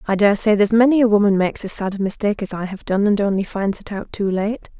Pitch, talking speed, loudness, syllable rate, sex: 205 Hz, 290 wpm, -19 LUFS, 6.6 syllables/s, female